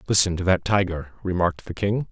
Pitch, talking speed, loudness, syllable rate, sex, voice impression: 95 Hz, 200 wpm, -23 LUFS, 6.1 syllables/s, male, masculine, middle-aged, thick, tensed, powerful, slightly soft, clear, cool, intellectual, mature, reassuring, wild, lively, slightly kind